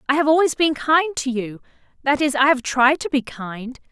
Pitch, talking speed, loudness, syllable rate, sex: 270 Hz, 215 wpm, -19 LUFS, 5.0 syllables/s, female